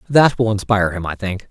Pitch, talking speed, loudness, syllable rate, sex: 105 Hz, 240 wpm, -18 LUFS, 6.0 syllables/s, male